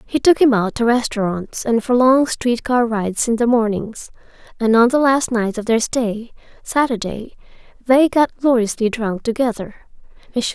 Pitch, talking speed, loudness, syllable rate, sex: 235 Hz, 165 wpm, -17 LUFS, 4.5 syllables/s, female